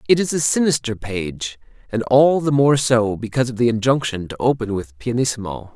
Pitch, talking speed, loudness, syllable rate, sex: 120 Hz, 190 wpm, -19 LUFS, 5.3 syllables/s, male